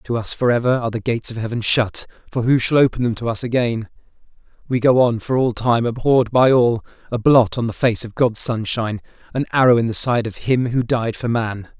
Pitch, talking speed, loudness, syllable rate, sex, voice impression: 120 Hz, 235 wpm, -18 LUFS, 5.7 syllables/s, male, masculine, adult-like, sincere, calm, slightly friendly, slightly reassuring